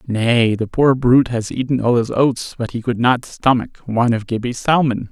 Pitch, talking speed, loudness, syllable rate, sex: 120 Hz, 200 wpm, -17 LUFS, 5.0 syllables/s, male